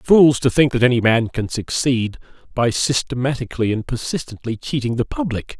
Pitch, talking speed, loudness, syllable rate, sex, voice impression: 125 Hz, 160 wpm, -19 LUFS, 5.2 syllables/s, male, very masculine, very adult-like, very middle-aged, very thick, tensed, powerful, bright, slightly soft, slightly muffled, fluent, cool, very intellectual, sincere, calm, very mature, very friendly, very reassuring, unique, elegant, very wild, lively, kind, slightly modest